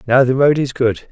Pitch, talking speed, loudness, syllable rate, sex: 125 Hz, 270 wpm, -15 LUFS, 5.2 syllables/s, male